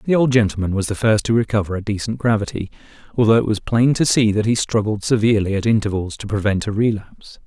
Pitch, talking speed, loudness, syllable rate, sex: 110 Hz, 215 wpm, -18 LUFS, 6.3 syllables/s, male